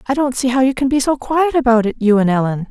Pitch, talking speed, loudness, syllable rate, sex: 250 Hz, 290 wpm, -15 LUFS, 6.2 syllables/s, female